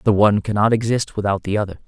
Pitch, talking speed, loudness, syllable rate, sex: 105 Hz, 225 wpm, -19 LUFS, 7.0 syllables/s, male